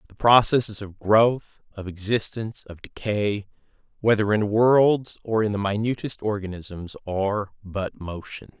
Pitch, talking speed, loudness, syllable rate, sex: 105 Hz, 135 wpm, -23 LUFS, 4.3 syllables/s, male